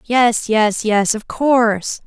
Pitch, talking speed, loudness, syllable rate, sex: 225 Hz, 145 wpm, -16 LUFS, 3.1 syllables/s, female